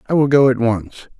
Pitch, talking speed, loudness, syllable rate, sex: 125 Hz, 250 wpm, -15 LUFS, 5.6 syllables/s, male